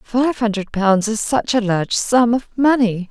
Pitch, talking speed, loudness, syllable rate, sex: 225 Hz, 195 wpm, -17 LUFS, 4.4 syllables/s, female